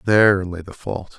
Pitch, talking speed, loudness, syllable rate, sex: 95 Hz, 205 wpm, -20 LUFS, 4.8 syllables/s, male